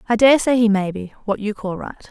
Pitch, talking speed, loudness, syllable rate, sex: 215 Hz, 230 wpm, -18 LUFS, 6.7 syllables/s, female